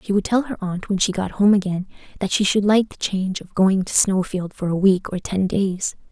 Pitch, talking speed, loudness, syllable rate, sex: 195 Hz, 255 wpm, -20 LUFS, 5.2 syllables/s, female